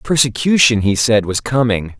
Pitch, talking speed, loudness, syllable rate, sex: 115 Hz, 150 wpm, -14 LUFS, 4.8 syllables/s, male